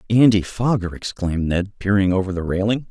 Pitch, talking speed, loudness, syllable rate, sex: 100 Hz, 165 wpm, -20 LUFS, 5.7 syllables/s, male